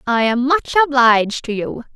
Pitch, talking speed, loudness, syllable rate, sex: 255 Hz, 185 wpm, -16 LUFS, 5.0 syllables/s, female